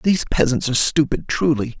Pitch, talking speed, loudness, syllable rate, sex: 135 Hz, 165 wpm, -19 LUFS, 6.0 syllables/s, male